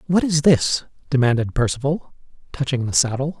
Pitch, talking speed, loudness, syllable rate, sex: 140 Hz, 140 wpm, -20 LUFS, 5.4 syllables/s, male